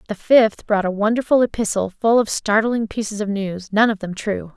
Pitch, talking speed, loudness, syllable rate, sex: 210 Hz, 210 wpm, -19 LUFS, 5.2 syllables/s, female